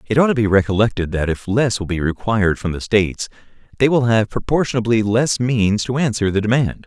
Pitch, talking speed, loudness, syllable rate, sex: 110 Hz, 210 wpm, -18 LUFS, 5.8 syllables/s, male